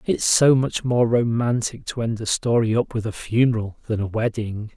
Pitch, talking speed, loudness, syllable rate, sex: 115 Hz, 200 wpm, -21 LUFS, 4.8 syllables/s, male